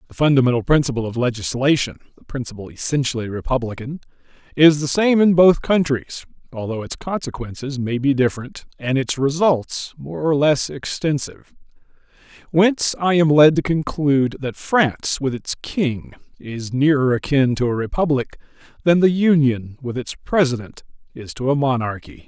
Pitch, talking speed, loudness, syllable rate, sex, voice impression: 135 Hz, 145 wpm, -19 LUFS, 5.1 syllables/s, male, masculine, adult-like, tensed, powerful, slightly hard, clear, cool, calm, slightly mature, friendly, wild, lively, slightly strict